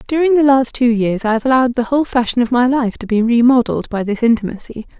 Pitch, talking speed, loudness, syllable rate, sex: 240 Hz, 240 wpm, -15 LUFS, 6.5 syllables/s, female